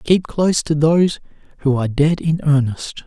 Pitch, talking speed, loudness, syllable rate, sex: 155 Hz, 175 wpm, -17 LUFS, 5.3 syllables/s, male